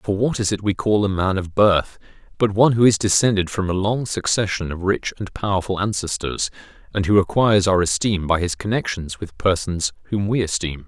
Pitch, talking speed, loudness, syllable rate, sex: 100 Hz, 205 wpm, -20 LUFS, 5.5 syllables/s, male